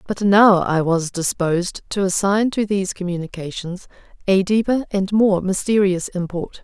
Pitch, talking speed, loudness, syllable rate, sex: 190 Hz, 145 wpm, -19 LUFS, 4.7 syllables/s, female